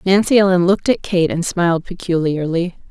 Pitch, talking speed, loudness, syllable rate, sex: 175 Hz, 165 wpm, -16 LUFS, 5.5 syllables/s, female